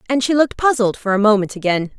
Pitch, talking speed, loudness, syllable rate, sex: 225 Hz, 240 wpm, -17 LUFS, 6.7 syllables/s, female